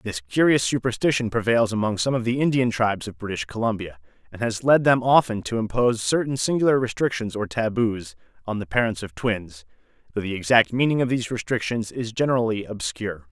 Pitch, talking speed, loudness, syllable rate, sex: 115 Hz, 180 wpm, -23 LUFS, 5.8 syllables/s, male